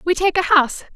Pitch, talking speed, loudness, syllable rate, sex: 340 Hz, 250 wpm, -17 LUFS, 6.6 syllables/s, female